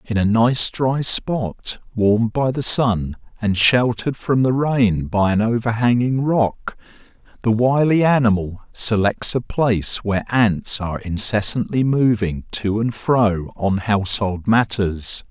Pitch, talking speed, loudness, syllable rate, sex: 110 Hz, 135 wpm, -18 LUFS, 3.9 syllables/s, male